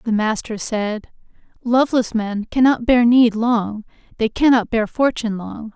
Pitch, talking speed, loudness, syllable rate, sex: 230 Hz, 145 wpm, -18 LUFS, 4.4 syllables/s, female